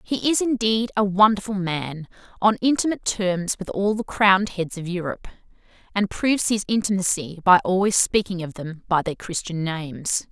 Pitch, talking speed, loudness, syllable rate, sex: 195 Hz, 165 wpm, -22 LUFS, 5.1 syllables/s, female